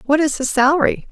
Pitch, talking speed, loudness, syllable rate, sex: 290 Hz, 215 wpm, -16 LUFS, 6.2 syllables/s, female